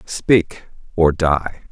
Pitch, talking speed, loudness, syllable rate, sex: 85 Hz, 105 wpm, -17 LUFS, 2.3 syllables/s, male